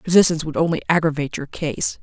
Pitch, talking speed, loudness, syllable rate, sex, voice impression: 155 Hz, 180 wpm, -20 LUFS, 7.0 syllables/s, female, feminine, adult-like, clear, fluent, intellectual, calm, sharp